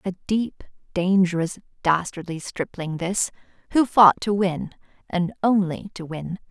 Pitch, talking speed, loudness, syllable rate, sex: 185 Hz, 130 wpm, -23 LUFS, 4.1 syllables/s, female